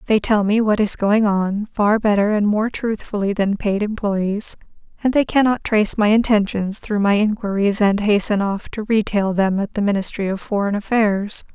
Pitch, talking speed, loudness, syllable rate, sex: 205 Hz, 185 wpm, -18 LUFS, 4.8 syllables/s, female